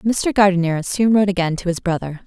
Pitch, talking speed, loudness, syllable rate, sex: 185 Hz, 210 wpm, -18 LUFS, 5.9 syllables/s, female